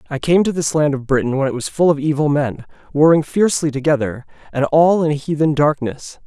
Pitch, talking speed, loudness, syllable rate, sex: 145 Hz, 210 wpm, -17 LUFS, 5.6 syllables/s, male